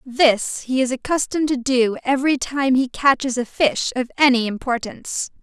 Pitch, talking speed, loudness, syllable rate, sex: 260 Hz, 165 wpm, -19 LUFS, 5.0 syllables/s, female